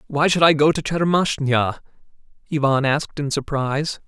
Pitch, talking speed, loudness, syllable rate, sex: 145 Hz, 145 wpm, -20 LUFS, 5.1 syllables/s, male